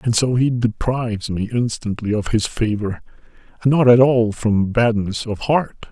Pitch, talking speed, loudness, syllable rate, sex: 115 Hz, 175 wpm, -18 LUFS, 4.5 syllables/s, male